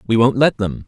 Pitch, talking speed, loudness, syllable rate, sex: 120 Hz, 275 wpm, -16 LUFS, 5.6 syllables/s, male